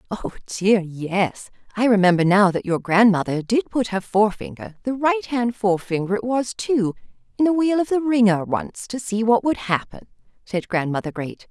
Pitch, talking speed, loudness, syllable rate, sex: 210 Hz, 175 wpm, -21 LUFS, 4.9 syllables/s, female